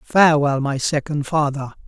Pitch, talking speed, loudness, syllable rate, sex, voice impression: 145 Hz, 130 wpm, -19 LUFS, 4.8 syllables/s, male, masculine, adult-like, powerful, slightly soft, muffled, slightly halting, slightly refreshing, calm, friendly, slightly wild, lively, slightly kind, slightly modest